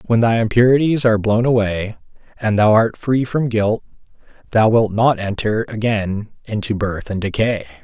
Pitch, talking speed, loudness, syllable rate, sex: 110 Hz, 160 wpm, -17 LUFS, 4.7 syllables/s, male